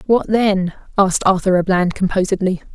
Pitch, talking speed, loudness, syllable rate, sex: 190 Hz, 155 wpm, -17 LUFS, 5.5 syllables/s, female